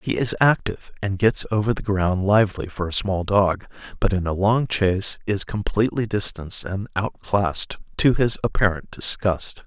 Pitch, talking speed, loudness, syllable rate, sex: 100 Hz, 170 wpm, -22 LUFS, 4.9 syllables/s, male